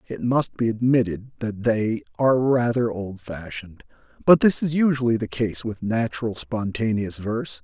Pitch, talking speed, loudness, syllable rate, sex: 110 Hz, 150 wpm, -23 LUFS, 4.8 syllables/s, male